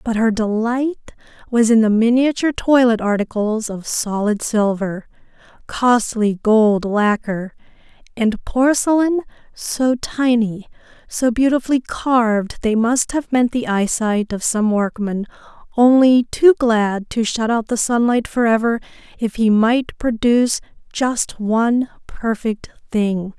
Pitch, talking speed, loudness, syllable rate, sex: 230 Hz, 125 wpm, -17 LUFS, 4.0 syllables/s, female